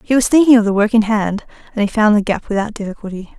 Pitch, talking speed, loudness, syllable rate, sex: 215 Hz, 265 wpm, -15 LUFS, 6.7 syllables/s, female